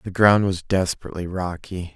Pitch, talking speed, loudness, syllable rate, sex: 95 Hz, 155 wpm, -22 LUFS, 5.5 syllables/s, male